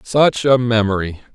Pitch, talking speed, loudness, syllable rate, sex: 115 Hz, 135 wpm, -16 LUFS, 4.5 syllables/s, male